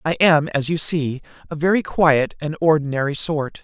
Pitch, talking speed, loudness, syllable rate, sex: 155 Hz, 180 wpm, -19 LUFS, 4.8 syllables/s, male